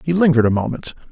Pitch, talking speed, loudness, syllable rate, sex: 140 Hz, 215 wpm, -17 LUFS, 8.0 syllables/s, male